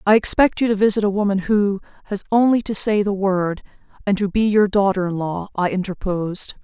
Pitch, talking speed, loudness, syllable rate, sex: 200 Hz, 210 wpm, -19 LUFS, 5.5 syllables/s, female